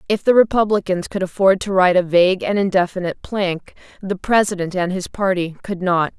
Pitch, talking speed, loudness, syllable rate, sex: 185 Hz, 185 wpm, -18 LUFS, 5.7 syllables/s, female